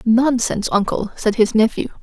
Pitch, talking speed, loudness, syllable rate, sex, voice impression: 225 Hz, 150 wpm, -18 LUFS, 5.0 syllables/s, female, very feminine, adult-like, slightly fluent, slightly intellectual, slightly calm, slightly elegant